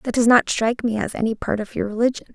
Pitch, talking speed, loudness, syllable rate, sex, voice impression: 225 Hz, 280 wpm, -20 LUFS, 6.7 syllables/s, female, feminine, slightly young, slightly soft, cute, calm, friendly, kind